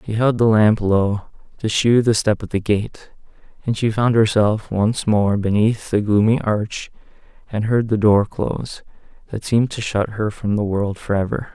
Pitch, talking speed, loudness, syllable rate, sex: 110 Hz, 190 wpm, -19 LUFS, 4.5 syllables/s, male